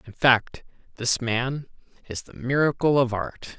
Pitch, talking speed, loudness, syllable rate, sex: 125 Hz, 150 wpm, -24 LUFS, 4.1 syllables/s, male